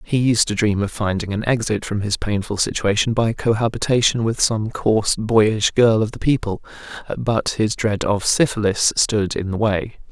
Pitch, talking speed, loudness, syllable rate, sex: 110 Hz, 185 wpm, -19 LUFS, 4.7 syllables/s, male